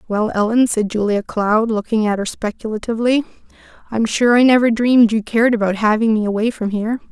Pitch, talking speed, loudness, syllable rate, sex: 220 Hz, 185 wpm, -17 LUFS, 6.0 syllables/s, female